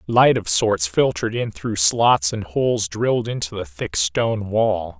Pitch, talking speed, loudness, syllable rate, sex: 105 Hz, 180 wpm, -20 LUFS, 4.4 syllables/s, male